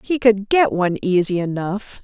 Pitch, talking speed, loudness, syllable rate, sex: 205 Hz, 175 wpm, -18 LUFS, 4.7 syllables/s, female